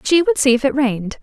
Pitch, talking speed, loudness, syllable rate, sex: 270 Hz, 295 wpm, -16 LUFS, 6.2 syllables/s, female